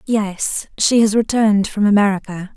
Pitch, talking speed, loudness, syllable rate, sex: 210 Hz, 140 wpm, -16 LUFS, 4.9 syllables/s, female